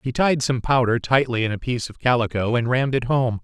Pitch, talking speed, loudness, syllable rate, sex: 120 Hz, 245 wpm, -21 LUFS, 6.0 syllables/s, male